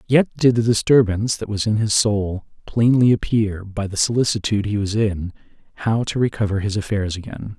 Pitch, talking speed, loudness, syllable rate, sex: 105 Hz, 180 wpm, -19 LUFS, 4.3 syllables/s, male